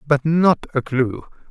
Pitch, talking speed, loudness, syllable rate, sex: 140 Hz, 160 wpm, -19 LUFS, 3.6 syllables/s, male